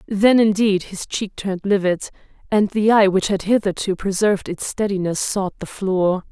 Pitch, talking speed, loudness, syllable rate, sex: 195 Hz, 170 wpm, -19 LUFS, 4.9 syllables/s, female